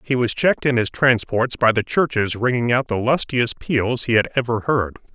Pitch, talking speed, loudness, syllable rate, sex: 120 Hz, 210 wpm, -19 LUFS, 4.9 syllables/s, male